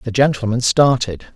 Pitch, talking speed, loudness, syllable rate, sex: 120 Hz, 135 wpm, -16 LUFS, 5.2 syllables/s, male